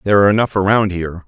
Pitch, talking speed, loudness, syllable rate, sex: 100 Hz, 235 wpm, -15 LUFS, 8.8 syllables/s, male